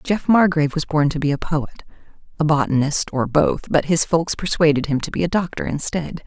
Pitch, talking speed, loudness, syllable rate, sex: 155 Hz, 190 wpm, -19 LUFS, 5.4 syllables/s, female